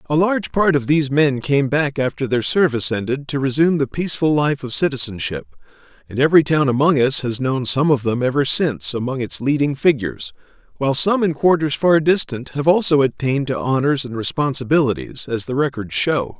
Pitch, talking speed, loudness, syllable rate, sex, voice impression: 135 Hz, 190 wpm, -18 LUFS, 5.7 syllables/s, male, masculine, adult-like, slightly middle-aged, slightly thick, slightly tensed, slightly powerful, very bright, slightly soft, very clear, very fluent, slightly raspy, cool, intellectual, very refreshing, sincere, slightly calm, slightly mature, friendly, reassuring, very unique, slightly elegant, wild, slightly sweet, very lively, kind, intense, slightly modest